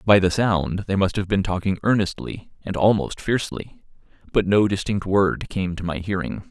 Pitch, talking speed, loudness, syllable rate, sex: 95 Hz, 185 wpm, -22 LUFS, 4.9 syllables/s, male